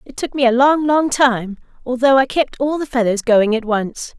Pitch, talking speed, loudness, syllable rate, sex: 255 Hz, 230 wpm, -16 LUFS, 4.8 syllables/s, female